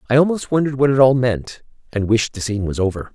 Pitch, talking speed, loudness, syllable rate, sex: 120 Hz, 250 wpm, -18 LUFS, 6.7 syllables/s, male